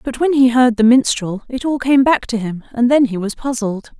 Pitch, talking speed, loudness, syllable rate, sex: 245 Hz, 255 wpm, -15 LUFS, 5.1 syllables/s, female